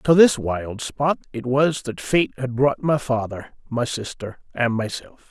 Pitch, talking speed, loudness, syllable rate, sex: 125 Hz, 180 wpm, -22 LUFS, 4.0 syllables/s, male